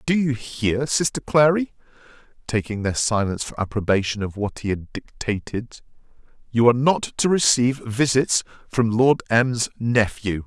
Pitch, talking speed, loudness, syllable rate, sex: 120 Hz, 145 wpm, -21 LUFS, 4.7 syllables/s, male